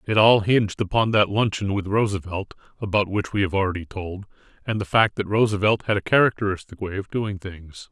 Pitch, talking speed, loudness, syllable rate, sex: 100 Hz, 195 wpm, -22 LUFS, 5.7 syllables/s, male